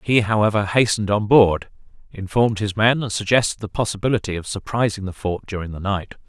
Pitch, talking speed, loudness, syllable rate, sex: 105 Hz, 180 wpm, -20 LUFS, 6.0 syllables/s, male